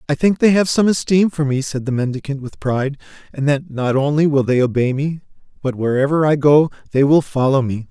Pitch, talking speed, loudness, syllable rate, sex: 145 Hz, 220 wpm, -17 LUFS, 5.6 syllables/s, male